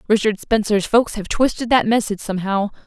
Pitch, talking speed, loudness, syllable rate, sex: 215 Hz, 165 wpm, -19 LUFS, 6.0 syllables/s, female